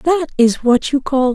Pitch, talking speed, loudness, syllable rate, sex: 270 Hz, 225 wpm, -15 LUFS, 4.0 syllables/s, female